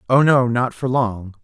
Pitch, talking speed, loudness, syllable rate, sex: 120 Hz, 210 wpm, -18 LUFS, 4.2 syllables/s, male